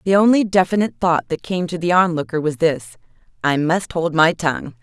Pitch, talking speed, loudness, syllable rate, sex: 165 Hz, 185 wpm, -18 LUFS, 5.8 syllables/s, female